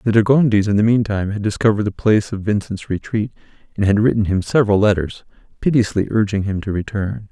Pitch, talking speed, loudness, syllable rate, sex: 105 Hz, 195 wpm, -18 LUFS, 6.4 syllables/s, male